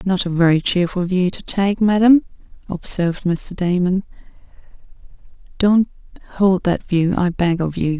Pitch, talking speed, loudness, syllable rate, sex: 185 Hz, 145 wpm, -18 LUFS, 4.6 syllables/s, female